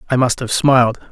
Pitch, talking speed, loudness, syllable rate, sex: 125 Hz, 215 wpm, -15 LUFS, 6.1 syllables/s, male